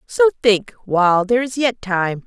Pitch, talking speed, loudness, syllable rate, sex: 210 Hz, 185 wpm, -17 LUFS, 4.7 syllables/s, female